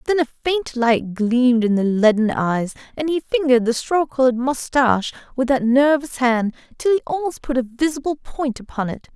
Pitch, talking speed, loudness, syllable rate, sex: 255 Hz, 190 wpm, -19 LUFS, 5.1 syllables/s, female